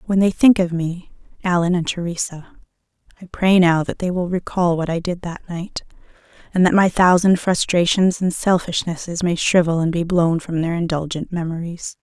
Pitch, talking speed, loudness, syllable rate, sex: 175 Hz, 180 wpm, -19 LUFS, 5.0 syllables/s, female